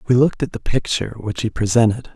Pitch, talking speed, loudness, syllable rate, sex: 115 Hz, 225 wpm, -19 LUFS, 6.8 syllables/s, male